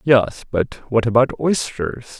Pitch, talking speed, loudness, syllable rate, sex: 120 Hz, 135 wpm, -19 LUFS, 3.7 syllables/s, male